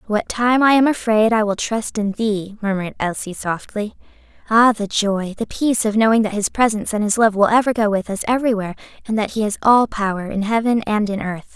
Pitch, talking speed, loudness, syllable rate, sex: 215 Hz, 225 wpm, -18 LUFS, 5.7 syllables/s, female